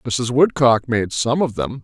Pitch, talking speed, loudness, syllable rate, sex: 120 Hz, 195 wpm, -18 LUFS, 3.9 syllables/s, male